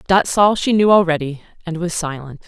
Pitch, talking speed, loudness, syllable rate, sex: 175 Hz, 195 wpm, -16 LUFS, 5.4 syllables/s, female